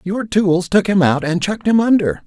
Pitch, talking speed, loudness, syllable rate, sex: 190 Hz, 240 wpm, -16 LUFS, 5.1 syllables/s, male